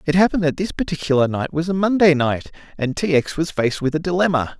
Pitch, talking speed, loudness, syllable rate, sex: 160 Hz, 235 wpm, -19 LUFS, 6.4 syllables/s, male